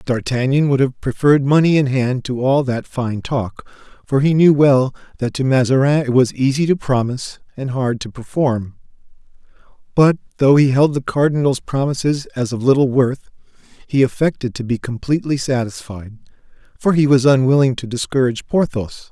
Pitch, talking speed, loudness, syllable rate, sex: 130 Hz, 165 wpm, -17 LUFS, 5.2 syllables/s, male